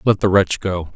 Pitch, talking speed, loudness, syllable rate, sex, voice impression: 95 Hz, 250 wpm, -17 LUFS, 4.9 syllables/s, male, masculine, very adult-like, slightly thick, cool, slightly intellectual, slightly friendly